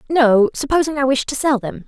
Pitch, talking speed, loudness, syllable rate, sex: 265 Hz, 225 wpm, -17 LUFS, 5.5 syllables/s, female